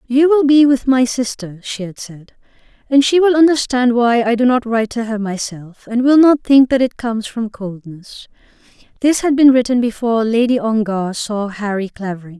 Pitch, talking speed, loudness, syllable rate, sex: 235 Hz, 195 wpm, -15 LUFS, 5.0 syllables/s, female